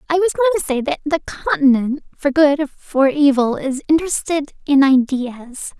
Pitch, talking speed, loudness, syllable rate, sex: 290 Hz, 175 wpm, -17 LUFS, 5.7 syllables/s, female